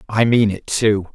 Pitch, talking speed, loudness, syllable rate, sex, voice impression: 105 Hz, 210 wpm, -17 LUFS, 4.4 syllables/s, male, masculine, adult-like, tensed, powerful, bright, slightly clear, raspy, cool, intellectual, mature, friendly, wild, lively, slightly intense